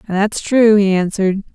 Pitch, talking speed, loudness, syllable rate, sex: 205 Hz, 155 wpm, -15 LUFS, 4.7 syllables/s, female